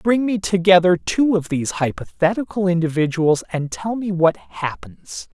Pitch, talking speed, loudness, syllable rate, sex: 175 Hz, 145 wpm, -19 LUFS, 4.6 syllables/s, male